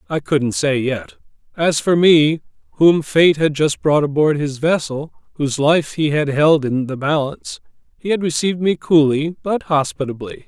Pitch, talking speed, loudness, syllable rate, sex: 150 Hz, 170 wpm, -17 LUFS, 4.7 syllables/s, male